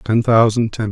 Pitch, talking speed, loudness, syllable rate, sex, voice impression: 110 Hz, 195 wpm, -15 LUFS, 4.4 syllables/s, male, very masculine, very adult-like, old, very thick, relaxed, slightly weak, dark, slightly hard, slightly muffled, slightly fluent, slightly cool, intellectual, sincere, very calm, very mature, friendly, very reassuring, slightly unique, slightly elegant, wild, slightly sweet, very kind, very modest